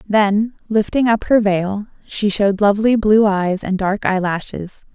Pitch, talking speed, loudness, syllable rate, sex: 205 Hz, 160 wpm, -17 LUFS, 4.3 syllables/s, female